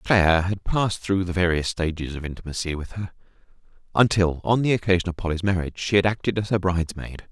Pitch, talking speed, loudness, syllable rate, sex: 90 Hz, 195 wpm, -23 LUFS, 6.3 syllables/s, male